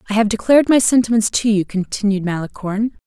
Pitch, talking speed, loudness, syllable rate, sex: 215 Hz, 175 wpm, -17 LUFS, 6.5 syllables/s, female